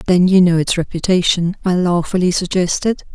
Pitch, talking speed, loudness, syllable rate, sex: 180 Hz, 155 wpm, -15 LUFS, 5.4 syllables/s, female